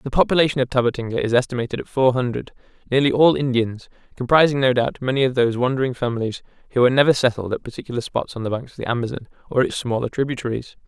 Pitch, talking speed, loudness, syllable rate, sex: 125 Hz, 205 wpm, -20 LUFS, 7.2 syllables/s, male